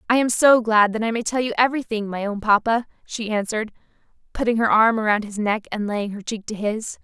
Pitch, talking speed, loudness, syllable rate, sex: 220 Hz, 230 wpm, -21 LUFS, 5.9 syllables/s, female